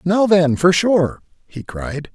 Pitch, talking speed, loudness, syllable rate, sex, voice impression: 165 Hz, 170 wpm, -16 LUFS, 3.9 syllables/s, male, masculine, middle-aged, slightly thick, cool, sincere, slightly friendly, slightly kind